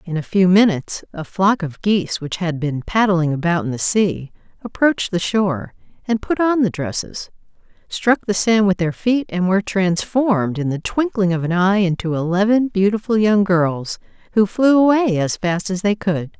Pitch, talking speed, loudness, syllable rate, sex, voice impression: 190 Hz, 190 wpm, -18 LUFS, 4.9 syllables/s, female, very feminine, very adult-like, middle-aged, thin, tensed, slightly powerful, slightly bright, soft, very clear, fluent, cute, very intellectual, refreshing, sincere, very calm, very friendly, very reassuring, very unique, very elegant, very sweet, lively, very kind, slightly modest